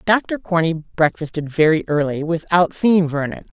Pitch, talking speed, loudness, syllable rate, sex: 165 Hz, 135 wpm, -18 LUFS, 4.4 syllables/s, female